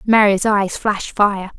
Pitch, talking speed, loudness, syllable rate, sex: 205 Hz, 150 wpm, -16 LUFS, 4.1 syllables/s, female